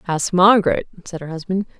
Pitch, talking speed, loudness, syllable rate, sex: 180 Hz, 165 wpm, -18 LUFS, 5.8 syllables/s, female